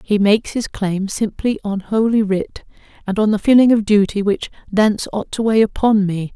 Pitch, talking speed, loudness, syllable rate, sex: 210 Hz, 200 wpm, -17 LUFS, 5.0 syllables/s, female